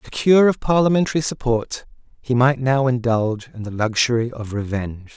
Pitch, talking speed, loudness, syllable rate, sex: 125 Hz, 150 wpm, -19 LUFS, 5.6 syllables/s, male